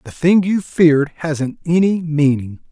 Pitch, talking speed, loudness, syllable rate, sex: 155 Hz, 155 wpm, -16 LUFS, 4.2 syllables/s, male